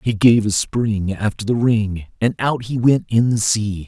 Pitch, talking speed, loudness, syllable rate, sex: 110 Hz, 215 wpm, -18 LUFS, 4.2 syllables/s, male